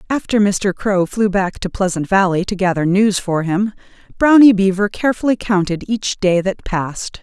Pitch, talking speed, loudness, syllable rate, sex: 195 Hz, 175 wpm, -16 LUFS, 4.9 syllables/s, female